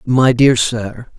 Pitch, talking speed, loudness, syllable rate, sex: 120 Hz, 150 wpm, -14 LUFS, 2.9 syllables/s, male